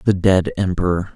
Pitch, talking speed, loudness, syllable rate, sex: 95 Hz, 155 wpm, -18 LUFS, 5.3 syllables/s, male